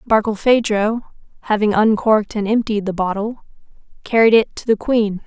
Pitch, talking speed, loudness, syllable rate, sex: 215 Hz, 135 wpm, -17 LUFS, 5.2 syllables/s, female